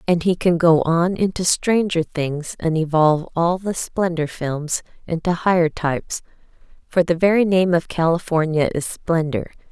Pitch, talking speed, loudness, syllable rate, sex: 170 Hz, 155 wpm, -20 LUFS, 4.5 syllables/s, female